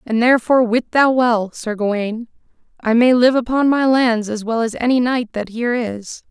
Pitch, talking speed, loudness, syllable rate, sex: 235 Hz, 200 wpm, -17 LUFS, 5.2 syllables/s, female